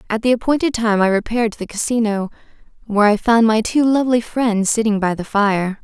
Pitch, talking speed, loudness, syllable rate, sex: 220 Hz, 205 wpm, -17 LUFS, 6.0 syllables/s, female